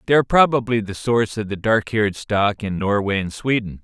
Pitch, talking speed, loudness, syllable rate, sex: 110 Hz, 220 wpm, -20 LUFS, 5.7 syllables/s, male